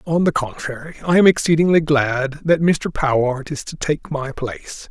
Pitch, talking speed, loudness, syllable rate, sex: 145 Hz, 185 wpm, -18 LUFS, 4.8 syllables/s, male